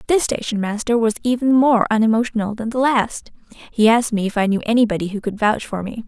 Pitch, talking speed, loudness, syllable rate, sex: 225 Hz, 215 wpm, -18 LUFS, 6.2 syllables/s, female